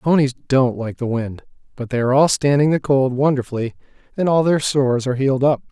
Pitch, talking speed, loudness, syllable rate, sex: 135 Hz, 220 wpm, -18 LUFS, 6.2 syllables/s, male